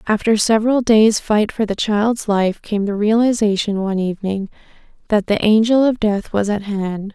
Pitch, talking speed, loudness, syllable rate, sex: 210 Hz, 175 wpm, -17 LUFS, 4.9 syllables/s, female